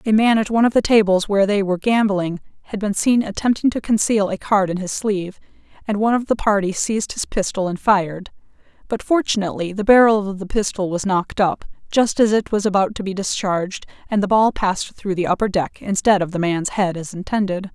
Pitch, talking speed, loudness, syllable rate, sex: 200 Hz, 220 wpm, -19 LUFS, 5.9 syllables/s, female